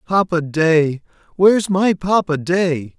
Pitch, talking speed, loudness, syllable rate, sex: 170 Hz, 120 wpm, -17 LUFS, 3.6 syllables/s, male